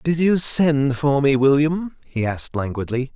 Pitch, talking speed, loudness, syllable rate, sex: 140 Hz, 170 wpm, -19 LUFS, 4.4 syllables/s, male